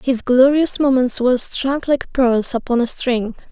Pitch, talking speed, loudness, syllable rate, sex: 255 Hz, 170 wpm, -17 LUFS, 4.2 syllables/s, female